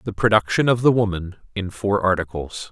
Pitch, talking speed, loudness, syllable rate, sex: 100 Hz, 175 wpm, -20 LUFS, 4.5 syllables/s, male